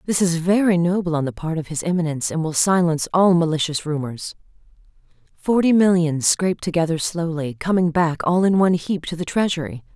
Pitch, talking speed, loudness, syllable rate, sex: 165 Hz, 180 wpm, -20 LUFS, 5.8 syllables/s, female